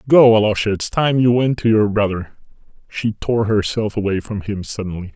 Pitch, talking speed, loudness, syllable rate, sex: 105 Hz, 185 wpm, -18 LUFS, 5.3 syllables/s, male